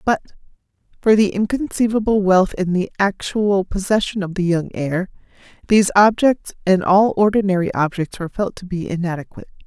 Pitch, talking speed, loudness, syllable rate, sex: 195 Hz, 150 wpm, -18 LUFS, 5.5 syllables/s, female